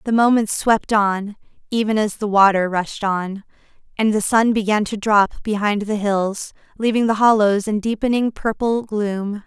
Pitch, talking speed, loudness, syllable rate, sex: 210 Hz, 165 wpm, -18 LUFS, 4.4 syllables/s, female